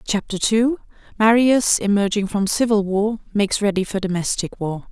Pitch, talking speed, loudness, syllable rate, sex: 210 Hz, 135 wpm, -19 LUFS, 5.0 syllables/s, female